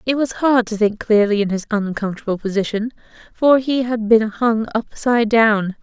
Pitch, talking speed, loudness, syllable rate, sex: 225 Hz, 175 wpm, -18 LUFS, 5.0 syllables/s, female